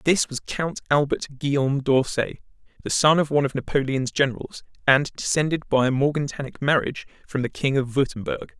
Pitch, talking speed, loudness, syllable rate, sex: 140 Hz, 170 wpm, -23 LUFS, 5.7 syllables/s, male